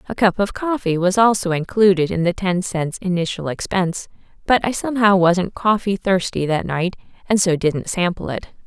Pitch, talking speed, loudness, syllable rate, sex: 185 Hz, 180 wpm, -19 LUFS, 5.1 syllables/s, female